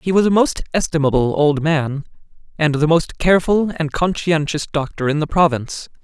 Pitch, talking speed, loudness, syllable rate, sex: 160 Hz, 170 wpm, -17 LUFS, 5.3 syllables/s, male